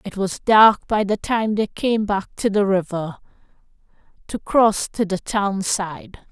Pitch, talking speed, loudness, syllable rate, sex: 200 Hz, 170 wpm, -19 LUFS, 3.8 syllables/s, female